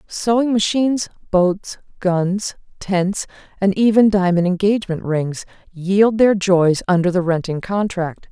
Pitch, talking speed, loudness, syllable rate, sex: 190 Hz, 125 wpm, -18 LUFS, 4.1 syllables/s, female